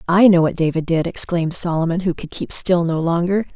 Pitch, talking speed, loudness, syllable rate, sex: 170 Hz, 220 wpm, -18 LUFS, 5.7 syllables/s, female